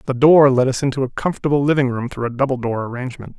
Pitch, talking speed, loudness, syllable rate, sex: 130 Hz, 250 wpm, -17 LUFS, 7.1 syllables/s, male